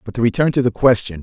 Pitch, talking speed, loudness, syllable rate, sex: 115 Hz, 295 wpm, -16 LUFS, 7.1 syllables/s, male